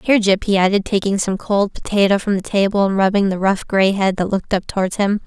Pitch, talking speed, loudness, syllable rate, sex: 195 Hz, 250 wpm, -17 LUFS, 6.0 syllables/s, female